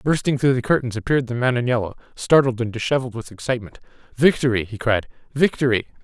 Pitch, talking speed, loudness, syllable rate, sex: 125 Hz, 180 wpm, -20 LUFS, 6.8 syllables/s, male